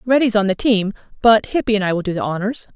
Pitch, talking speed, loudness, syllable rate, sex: 210 Hz, 260 wpm, -18 LUFS, 6.5 syllables/s, female